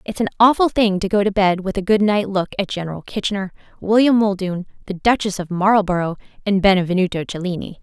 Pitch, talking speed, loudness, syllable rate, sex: 195 Hz, 190 wpm, -18 LUFS, 5.9 syllables/s, female